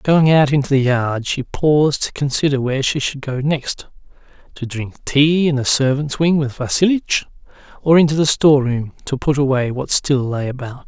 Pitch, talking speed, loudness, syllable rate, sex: 140 Hz, 190 wpm, -17 LUFS, 5.0 syllables/s, male